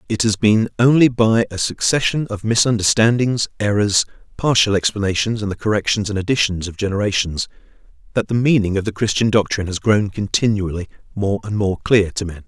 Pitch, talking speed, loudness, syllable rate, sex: 105 Hz, 170 wpm, -18 LUFS, 5.7 syllables/s, male